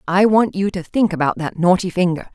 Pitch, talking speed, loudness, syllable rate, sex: 185 Hz, 230 wpm, -17 LUFS, 5.5 syllables/s, female